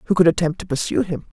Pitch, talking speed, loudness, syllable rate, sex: 165 Hz, 255 wpm, -20 LUFS, 7.1 syllables/s, male